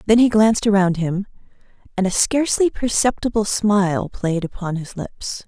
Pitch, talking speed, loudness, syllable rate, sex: 205 Hz, 155 wpm, -19 LUFS, 5.0 syllables/s, female